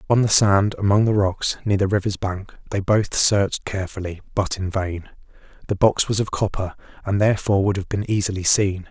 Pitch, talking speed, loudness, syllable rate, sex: 100 Hz, 195 wpm, -20 LUFS, 5.4 syllables/s, male